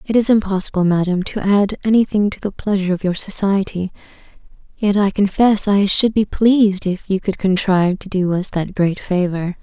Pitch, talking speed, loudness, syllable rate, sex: 195 Hz, 185 wpm, -17 LUFS, 5.3 syllables/s, female